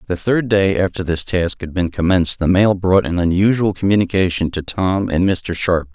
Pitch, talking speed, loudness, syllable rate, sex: 90 Hz, 200 wpm, -17 LUFS, 5.1 syllables/s, male